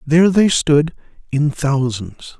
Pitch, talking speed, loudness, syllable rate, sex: 150 Hz, 125 wpm, -16 LUFS, 3.8 syllables/s, male